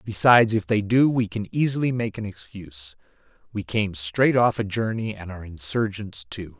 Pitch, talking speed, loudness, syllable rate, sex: 105 Hz, 180 wpm, -23 LUFS, 5.1 syllables/s, male